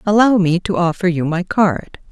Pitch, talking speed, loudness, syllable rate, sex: 185 Hz, 200 wpm, -16 LUFS, 4.7 syllables/s, female